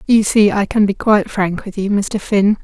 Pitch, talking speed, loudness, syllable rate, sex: 205 Hz, 250 wpm, -15 LUFS, 4.9 syllables/s, female